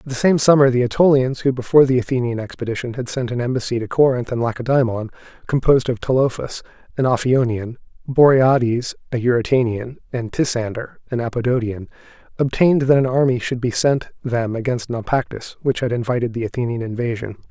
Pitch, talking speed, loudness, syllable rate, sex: 125 Hz, 160 wpm, -19 LUFS, 5.9 syllables/s, male